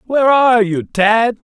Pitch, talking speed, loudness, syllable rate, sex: 220 Hz, 160 wpm, -13 LUFS, 4.8 syllables/s, male